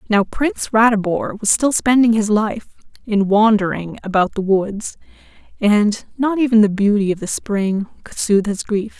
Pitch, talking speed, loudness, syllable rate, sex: 215 Hz, 165 wpm, -17 LUFS, 4.7 syllables/s, female